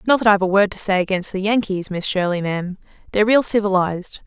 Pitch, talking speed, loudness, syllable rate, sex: 195 Hz, 225 wpm, -19 LUFS, 6.6 syllables/s, female